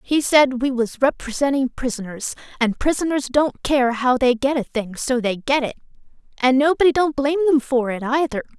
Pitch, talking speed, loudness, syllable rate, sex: 260 Hz, 190 wpm, -20 LUFS, 5.2 syllables/s, female